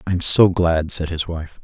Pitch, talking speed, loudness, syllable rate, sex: 85 Hz, 255 wpm, -17 LUFS, 4.6 syllables/s, male